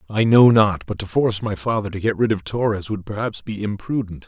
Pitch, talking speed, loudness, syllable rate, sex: 105 Hz, 225 wpm, -20 LUFS, 5.7 syllables/s, male